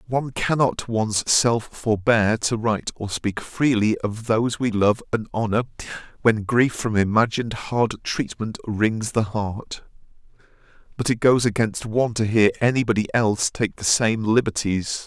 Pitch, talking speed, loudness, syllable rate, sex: 110 Hz, 155 wpm, -22 LUFS, 4.6 syllables/s, male